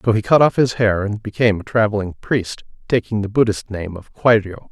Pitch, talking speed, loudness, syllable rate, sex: 105 Hz, 205 wpm, -18 LUFS, 5.6 syllables/s, male